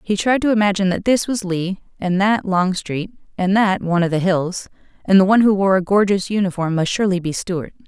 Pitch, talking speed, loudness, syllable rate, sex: 190 Hz, 220 wpm, -18 LUFS, 5.8 syllables/s, female